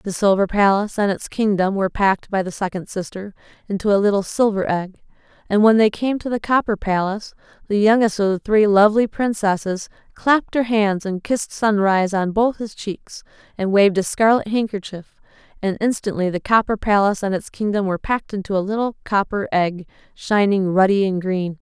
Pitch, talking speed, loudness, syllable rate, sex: 200 Hz, 185 wpm, -19 LUFS, 5.6 syllables/s, female